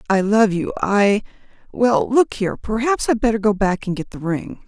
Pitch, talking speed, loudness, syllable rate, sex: 215 Hz, 190 wpm, -19 LUFS, 4.9 syllables/s, female